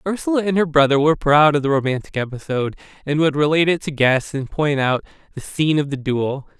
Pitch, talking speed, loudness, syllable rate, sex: 150 Hz, 220 wpm, -18 LUFS, 6.3 syllables/s, male